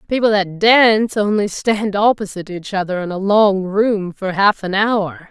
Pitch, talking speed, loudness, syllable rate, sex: 200 Hz, 180 wpm, -16 LUFS, 4.5 syllables/s, female